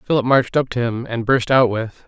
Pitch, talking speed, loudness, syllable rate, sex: 125 Hz, 260 wpm, -18 LUFS, 5.4 syllables/s, male